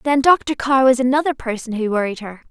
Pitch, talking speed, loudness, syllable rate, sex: 250 Hz, 215 wpm, -17 LUFS, 5.5 syllables/s, female